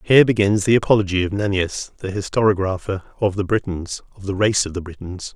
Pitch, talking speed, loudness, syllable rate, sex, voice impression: 100 Hz, 190 wpm, -20 LUFS, 6.0 syllables/s, male, very masculine, very adult-like, very thick, tensed, powerful, slightly bright, slightly hard, slightly muffled, fluent, very cool, intellectual, slightly refreshing, sincere, very calm, very mature, friendly, reassuring, unique, elegant, wild, very sweet, slightly lively, very kind